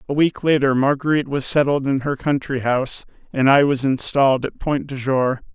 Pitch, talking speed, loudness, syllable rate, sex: 135 Hz, 195 wpm, -19 LUFS, 5.4 syllables/s, male